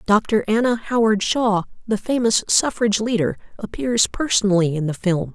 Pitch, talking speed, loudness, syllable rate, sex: 215 Hz, 145 wpm, -19 LUFS, 4.8 syllables/s, female